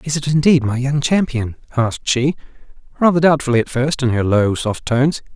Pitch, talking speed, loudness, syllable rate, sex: 135 Hz, 190 wpm, -17 LUFS, 5.6 syllables/s, male